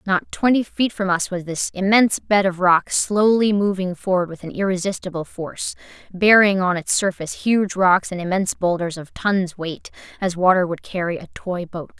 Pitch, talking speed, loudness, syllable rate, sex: 185 Hz, 180 wpm, -20 LUFS, 5.0 syllables/s, female